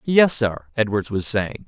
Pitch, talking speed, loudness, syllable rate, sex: 115 Hz, 180 wpm, -21 LUFS, 4.0 syllables/s, male